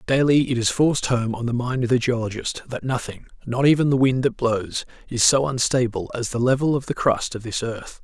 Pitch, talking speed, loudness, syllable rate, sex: 125 Hz, 230 wpm, -21 LUFS, 5.4 syllables/s, male